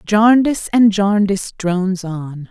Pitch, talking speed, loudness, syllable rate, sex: 200 Hz, 120 wpm, -15 LUFS, 4.2 syllables/s, female